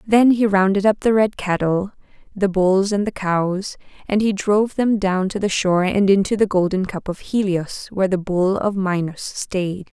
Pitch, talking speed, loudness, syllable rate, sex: 195 Hz, 200 wpm, -19 LUFS, 4.7 syllables/s, female